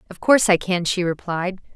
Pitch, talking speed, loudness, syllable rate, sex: 185 Hz, 205 wpm, -20 LUFS, 5.7 syllables/s, female